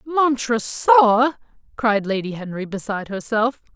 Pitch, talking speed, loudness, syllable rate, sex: 225 Hz, 95 wpm, -20 LUFS, 4.4 syllables/s, female